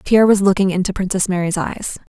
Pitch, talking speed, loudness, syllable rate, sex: 190 Hz, 195 wpm, -17 LUFS, 6.4 syllables/s, female